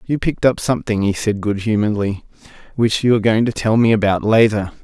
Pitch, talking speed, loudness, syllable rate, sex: 110 Hz, 210 wpm, -17 LUFS, 6.3 syllables/s, male